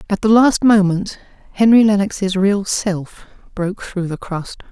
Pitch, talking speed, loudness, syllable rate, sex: 200 Hz, 155 wpm, -16 LUFS, 4.2 syllables/s, female